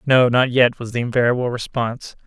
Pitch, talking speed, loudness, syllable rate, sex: 120 Hz, 185 wpm, -18 LUFS, 5.8 syllables/s, male